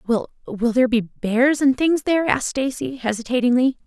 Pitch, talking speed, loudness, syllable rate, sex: 250 Hz, 155 wpm, -20 LUFS, 5.4 syllables/s, female